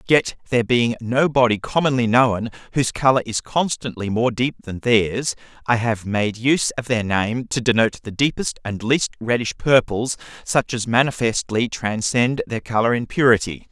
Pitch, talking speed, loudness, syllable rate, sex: 120 Hz, 170 wpm, -20 LUFS, 4.9 syllables/s, male